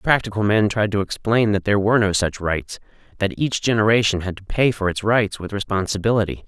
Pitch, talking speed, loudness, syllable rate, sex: 105 Hz, 195 wpm, -20 LUFS, 5.8 syllables/s, male